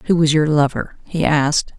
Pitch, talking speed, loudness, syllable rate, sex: 155 Hz, 200 wpm, -17 LUFS, 5.3 syllables/s, female